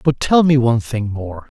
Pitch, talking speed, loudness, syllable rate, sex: 125 Hz, 225 wpm, -16 LUFS, 5.0 syllables/s, male